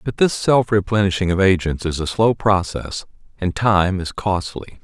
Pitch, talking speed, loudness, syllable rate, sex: 95 Hz, 175 wpm, -19 LUFS, 4.5 syllables/s, male